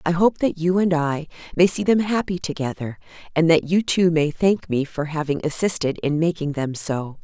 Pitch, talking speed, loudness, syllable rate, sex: 165 Hz, 205 wpm, -21 LUFS, 5.0 syllables/s, female